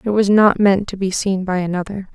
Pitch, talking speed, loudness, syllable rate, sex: 195 Hz, 250 wpm, -17 LUFS, 5.4 syllables/s, female